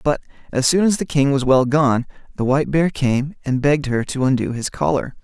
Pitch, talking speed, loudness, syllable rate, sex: 135 Hz, 230 wpm, -19 LUFS, 5.5 syllables/s, male